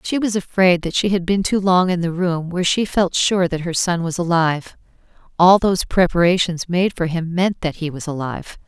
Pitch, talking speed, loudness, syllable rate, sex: 175 Hz, 220 wpm, -18 LUFS, 5.3 syllables/s, female